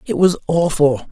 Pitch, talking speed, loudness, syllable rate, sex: 155 Hz, 160 wpm, -16 LUFS, 4.4 syllables/s, male